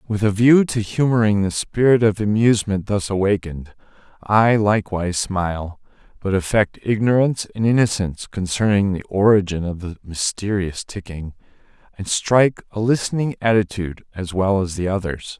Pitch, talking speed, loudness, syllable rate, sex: 100 Hz, 140 wpm, -19 LUFS, 5.2 syllables/s, male